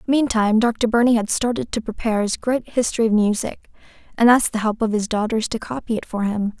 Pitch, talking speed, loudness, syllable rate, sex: 225 Hz, 220 wpm, -20 LUFS, 6.0 syllables/s, female